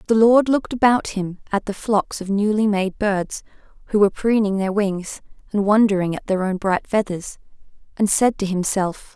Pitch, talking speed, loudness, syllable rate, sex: 205 Hz, 185 wpm, -20 LUFS, 4.9 syllables/s, female